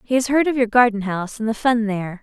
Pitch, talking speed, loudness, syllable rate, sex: 230 Hz, 295 wpm, -19 LUFS, 6.6 syllables/s, female